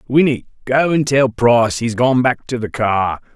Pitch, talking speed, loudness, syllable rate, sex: 125 Hz, 195 wpm, -16 LUFS, 4.5 syllables/s, male